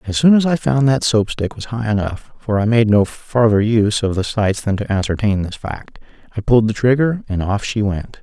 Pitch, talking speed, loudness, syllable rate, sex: 110 Hz, 235 wpm, -17 LUFS, 3.3 syllables/s, male